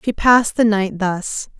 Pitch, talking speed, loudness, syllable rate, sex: 210 Hz, 190 wpm, -17 LUFS, 4.2 syllables/s, female